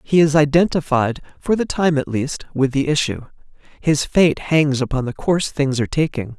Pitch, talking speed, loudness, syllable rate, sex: 145 Hz, 190 wpm, -18 LUFS, 5.1 syllables/s, male